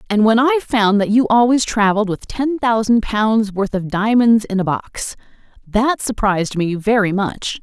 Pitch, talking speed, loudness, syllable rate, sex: 215 Hz, 180 wpm, -16 LUFS, 4.5 syllables/s, female